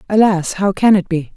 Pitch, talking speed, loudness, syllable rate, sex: 190 Hz, 220 wpm, -15 LUFS, 5.3 syllables/s, female